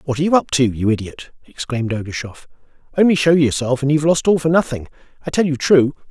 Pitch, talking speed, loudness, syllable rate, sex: 140 Hz, 215 wpm, -17 LUFS, 6.6 syllables/s, male